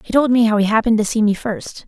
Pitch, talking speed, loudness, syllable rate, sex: 220 Hz, 320 wpm, -16 LUFS, 6.8 syllables/s, female